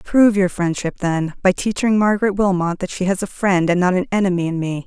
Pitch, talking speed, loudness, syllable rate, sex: 185 Hz, 235 wpm, -18 LUFS, 5.8 syllables/s, female